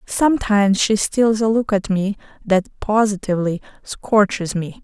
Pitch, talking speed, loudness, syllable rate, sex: 205 Hz, 135 wpm, -18 LUFS, 4.5 syllables/s, female